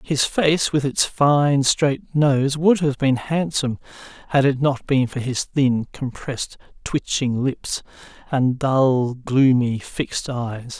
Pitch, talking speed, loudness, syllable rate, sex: 135 Hz, 145 wpm, -20 LUFS, 3.6 syllables/s, male